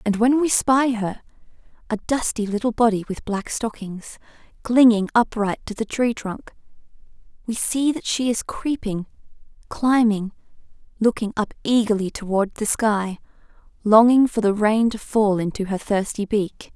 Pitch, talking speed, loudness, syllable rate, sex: 220 Hz, 145 wpm, -21 LUFS, 4.5 syllables/s, female